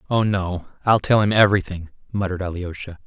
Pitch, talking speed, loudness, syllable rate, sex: 95 Hz, 155 wpm, -20 LUFS, 6.1 syllables/s, male